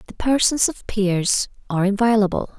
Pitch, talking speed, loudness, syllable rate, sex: 210 Hz, 140 wpm, -20 LUFS, 5.0 syllables/s, female